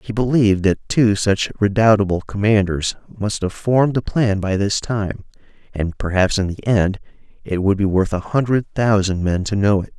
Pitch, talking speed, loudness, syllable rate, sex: 100 Hz, 185 wpm, -18 LUFS, 4.8 syllables/s, male